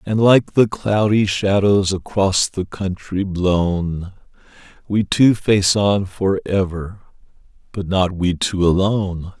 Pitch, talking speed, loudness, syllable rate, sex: 95 Hz, 130 wpm, -18 LUFS, 3.4 syllables/s, male